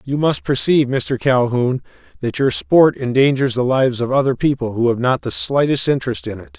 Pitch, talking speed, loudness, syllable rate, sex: 130 Hz, 200 wpm, -17 LUFS, 5.5 syllables/s, male